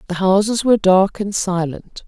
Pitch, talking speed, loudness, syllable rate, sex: 195 Hz, 175 wpm, -16 LUFS, 4.8 syllables/s, female